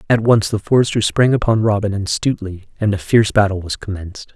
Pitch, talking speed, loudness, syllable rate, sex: 105 Hz, 205 wpm, -17 LUFS, 6.2 syllables/s, male